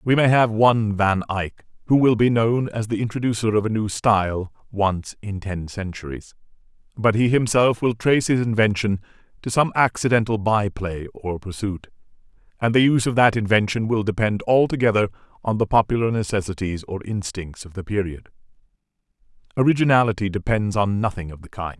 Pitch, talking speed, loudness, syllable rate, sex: 105 Hz, 165 wpm, -21 LUFS, 5.4 syllables/s, male